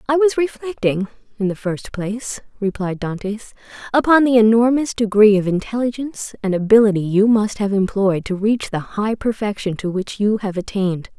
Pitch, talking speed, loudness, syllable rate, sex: 215 Hz, 165 wpm, -18 LUFS, 5.2 syllables/s, female